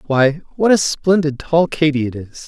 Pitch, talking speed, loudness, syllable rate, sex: 150 Hz, 195 wpm, -16 LUFS, 4.3 syllables/s, male